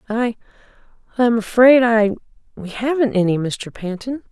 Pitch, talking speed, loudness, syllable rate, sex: 225 Hz, 95 wpm, -17 LUFS, 4.9 syllables/s, female